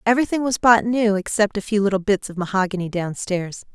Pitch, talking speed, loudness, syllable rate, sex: 205 Hz, 210 wpm, -20 LUFS, 5.9 syllables/s, female